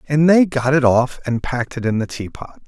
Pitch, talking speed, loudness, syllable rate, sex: 135 Hz, 245 wpm, -17 LUFS, 5.6 syllables/s, male